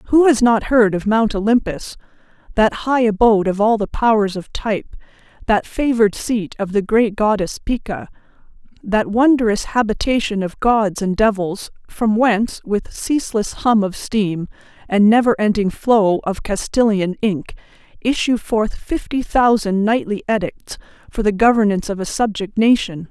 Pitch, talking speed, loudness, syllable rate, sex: 215 Hz, 150 wpm, -17 LUFS, 4.6 syllables/s, female